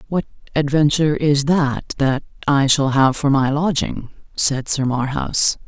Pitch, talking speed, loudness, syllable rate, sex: 140 Hz, 150 wpm, -18 LUFS, 4.1 syllables/s, female